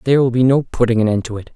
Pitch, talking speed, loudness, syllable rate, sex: 120 Hz, 345 wpm, -16 LUFS, 7.7 syllables/s, male